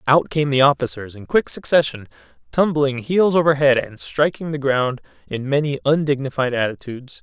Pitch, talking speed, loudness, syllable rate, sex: 135 Hz, 160 wpm, -19 LUFS, 5.2 syllables/s, male